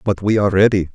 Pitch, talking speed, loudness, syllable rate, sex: 100 Hz, 255 wpm, -15 LUFS, 7.2 syllables/s, male